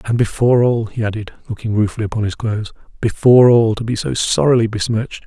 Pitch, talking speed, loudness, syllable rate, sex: 110 Hz, 180 wpm, -16 LUFS, 6.6 syllables/s, male